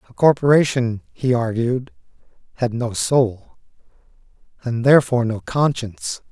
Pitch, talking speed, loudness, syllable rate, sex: 125 Hz, 105 wpm, -19 LUFS, 4.8 syllables/s, male